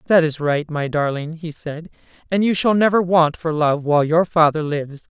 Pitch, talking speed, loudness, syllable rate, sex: 160 Hz, 210 wpm, -18 LUFS, 5.2 syllables/s, female